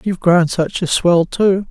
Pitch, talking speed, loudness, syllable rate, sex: 180 Hz, 210 wpm, -15 LUFS, 4.4 syllables/s, female